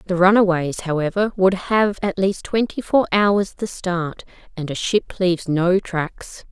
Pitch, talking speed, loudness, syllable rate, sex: 185 Hz, 165 wpm, -20 LUFS, 4.1 syllables/s, female